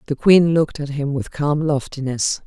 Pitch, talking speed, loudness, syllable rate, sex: 150 Hz, 195 wpm, -19 LUFS, 4.9 syllables/s, female